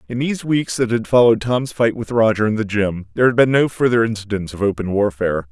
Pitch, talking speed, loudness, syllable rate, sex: 110 Hz, 240 wpm, -18 LUFS, 6.3 syllables/s, male